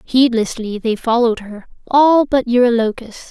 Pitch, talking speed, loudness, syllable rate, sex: 240 Hz, 125 wpm, -15 LUFS, 4.7 syllables/s, female